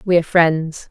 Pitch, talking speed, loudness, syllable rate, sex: 170 Hz, 200 wpm, -16 LUFS, 5.1 syllables/s, female